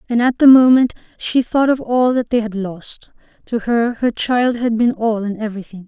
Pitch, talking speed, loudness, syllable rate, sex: 230 Hz, 215 wpm, -16 LUFS, 4.9 syllables/s, female